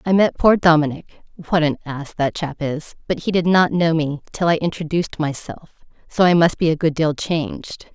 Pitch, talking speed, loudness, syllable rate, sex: 160 Hz, 195 wpm, -19 LUFS, 5.2 syllables/s, female